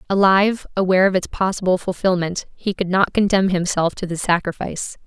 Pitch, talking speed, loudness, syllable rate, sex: 185 Hz, 165 wpm, -19 LUFS, 5.8 syllables/s, female